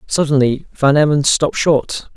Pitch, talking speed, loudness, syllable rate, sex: 145 Hz, 140 wpm, -15 LUFS, 4.8 syllables/s, male